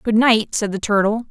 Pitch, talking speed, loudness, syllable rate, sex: 215 Hz, 230 wpm, -17 LUFS, 5.0 syllables/s, female